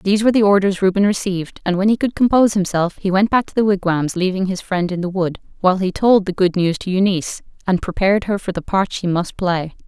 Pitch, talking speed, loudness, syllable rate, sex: 190 Hz, 250 wpm, -18 LUFS, 6.2 syllables/s, female